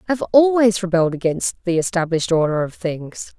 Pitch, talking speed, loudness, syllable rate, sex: 185 Hz, 160 wpm, -18 LUFS, 6.0 syllables/s, female